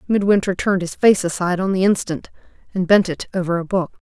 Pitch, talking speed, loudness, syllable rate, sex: 185 Hz, 205 wpm, -19 LUFS, 6.3 syllables/s, female